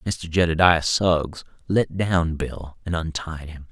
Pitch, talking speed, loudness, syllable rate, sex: 85 Hz, 145 wpm, -22 LUFS, 3.7 syllables/s, male